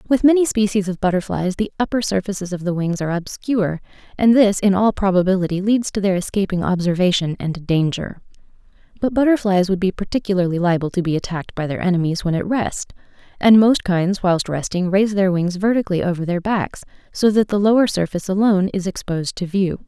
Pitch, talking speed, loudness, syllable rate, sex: 190 Hz, 185 wpm, -19 LUFS, 6.0 syllables/s, female